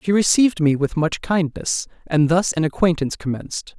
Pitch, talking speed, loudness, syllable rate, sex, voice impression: 165 Hz, 175 wpm, -20 LUFS, 5.4 syllables/s, male, masculine, adult-like, tensed, powerful, slightly muffled, fluent, slightly raspy, intellectual, slightly refreshing, friendly, lively, kind, slightly light